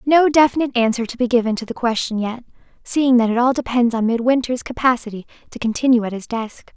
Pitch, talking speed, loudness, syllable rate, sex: 240 Hz, 205 wpm, -18 LUFS, 6.2 syllables/s, female